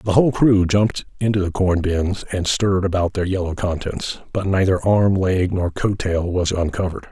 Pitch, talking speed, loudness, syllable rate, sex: 95 Hz, 195 wpm, -19 LUFS, 5.1 syllables/s, male